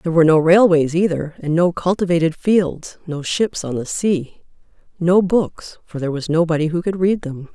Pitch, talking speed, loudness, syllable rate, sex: 170 Hz, 190 wpm, -18 LUFS, 5.1 syllables/s, female